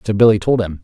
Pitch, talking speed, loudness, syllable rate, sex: 105 Hz, 285 wpm, -14 LUFS, 7.3 syllables/s, male